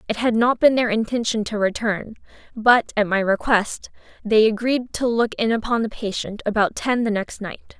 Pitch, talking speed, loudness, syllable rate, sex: 220 Hz, 190 wpm, -20 LUFS, 4.9 syllables/s, female